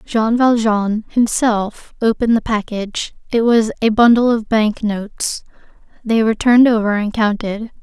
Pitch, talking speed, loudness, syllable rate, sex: 220 Hz, 145 wpm, -16 LUFS, 4.6 syllables/s, female